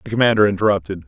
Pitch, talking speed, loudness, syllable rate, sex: 100 Hz, 165 wpm, -17 LUFS, 8.5 syllables/s, male